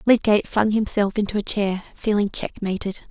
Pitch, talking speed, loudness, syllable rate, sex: 205 Hz, 155 wpm, -22 LUFS, 5.4 syllables/s, female